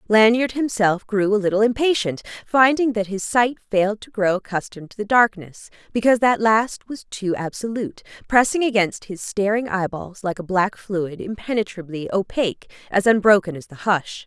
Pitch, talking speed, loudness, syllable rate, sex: 205 Hz, 165 wpm, -20 LUFS, 5.2 syllables/s, female